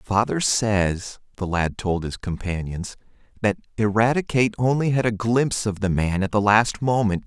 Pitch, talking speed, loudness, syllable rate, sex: 105 Hz, 165 wpm, -22 LUFS, 4.7 syllables/s, male